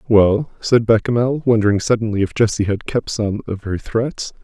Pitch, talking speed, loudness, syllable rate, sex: 110 Hz, 175 wpm, -18 LUFS, 5.0 syllables/s, male